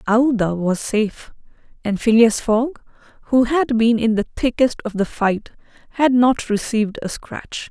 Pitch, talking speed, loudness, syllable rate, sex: 230 Hz, 155 wpm, -19 LUFS, 4.6 syllables/s, female